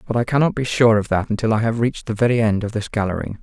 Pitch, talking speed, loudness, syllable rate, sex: 115 Hz, 300 wpm, -19 LUFS, 7.1 syllables/s, male